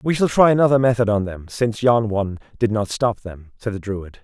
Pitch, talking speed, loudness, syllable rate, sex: 110 Hz, 240 wpm, -19 LUFS, 5.8 syllables/s, male